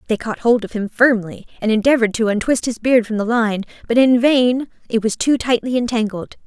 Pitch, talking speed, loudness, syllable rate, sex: 230 Hz, 215 wpm, -17 LUFS, 5.5 syllables/s, female